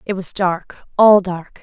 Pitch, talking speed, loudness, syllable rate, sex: 190 Hz, 150 wpm, -15 LUFS, 3.9 syllables/s, female